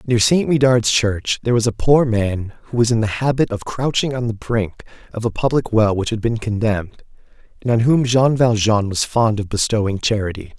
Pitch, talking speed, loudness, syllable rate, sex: 115 Hz, 210 wpm, -18 LUFS, 5.2 syllables/s, male